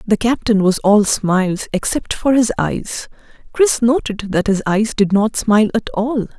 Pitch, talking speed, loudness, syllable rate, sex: 215 Hz, 180 wpm, -16 LUFS, 4.4 syllables/s, female